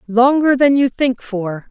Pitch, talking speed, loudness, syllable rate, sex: 245 Hz, 175 wpm, -15 LUFS, 3.9 syllables/s, female